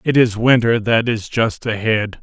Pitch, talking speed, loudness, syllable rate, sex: 115 Hz, 190 wpm, -16 LUFS, 4.2 syllables/s, male